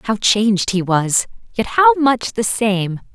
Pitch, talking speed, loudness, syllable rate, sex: 220 Hz, 170 wpm, -16 LUFS, 3.6 syllables/s, female